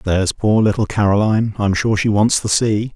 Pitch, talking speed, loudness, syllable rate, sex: 105 Hz, 205 wpm, -16 LUFS, 5.4 syllables/s, male